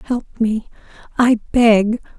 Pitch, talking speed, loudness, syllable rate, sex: 225 Hz, 110 wpm, -17 LUFS, 3.1 syllables/s, female